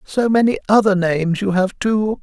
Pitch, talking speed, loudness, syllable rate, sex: 200 Hz, 190 wpm, -17 LUFS, 4.9 syllables/s, male